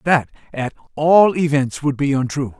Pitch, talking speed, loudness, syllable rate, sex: 140 Hz, 160 wpm, -18 LUFS, 4.5 syllables/s, male